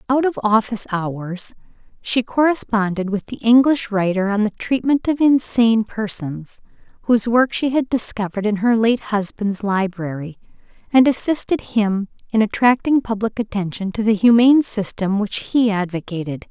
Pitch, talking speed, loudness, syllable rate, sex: 220 Hz, 145 wpm, -18 LUFS, 4.9 syllables/s, female